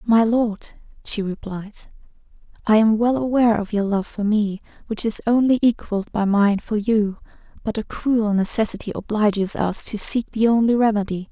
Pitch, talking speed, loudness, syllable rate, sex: 215 Hz, 170 wpm, -20 LUFS, 5.0 syllables/s, female